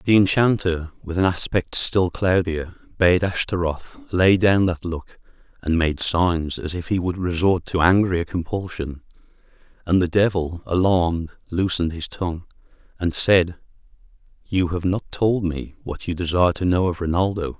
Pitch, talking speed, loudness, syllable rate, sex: 90 Hz, 155 wpm, -21 LUFS, 4.6 syllables/s, male